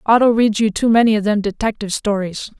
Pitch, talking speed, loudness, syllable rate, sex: 215 Hz, 210 wpm, -16 LUFS, 6.2 syllables/s, female